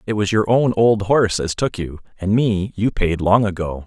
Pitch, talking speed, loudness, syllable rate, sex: 100 Hz, 235 wpm, -18 LUFS, 4.8 syllables/s, male